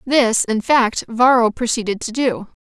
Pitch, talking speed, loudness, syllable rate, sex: 235 Hz, 160 wpm, -17 LUFS, 4.2 syllables/s, female